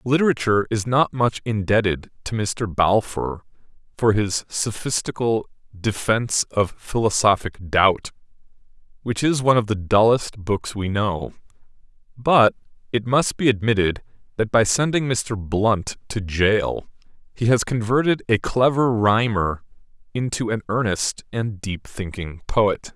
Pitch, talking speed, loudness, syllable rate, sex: 110 Hz, 130 wpm, -21 LUFS, 4.2 syllables/s, male